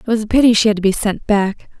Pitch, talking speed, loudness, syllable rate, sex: 215 Hz, 335 wpm, -15 LUFS, 6.6 syllables/s, female